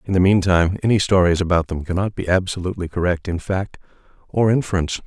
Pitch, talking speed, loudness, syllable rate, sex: 90 Hz, 180 wpm, -19 LUFS, 6.6 syllables/s, male